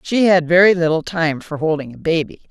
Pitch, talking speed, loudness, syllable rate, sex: 165 Hz, 215 wpm, -16 LUFS, 5.6 syllables/s, female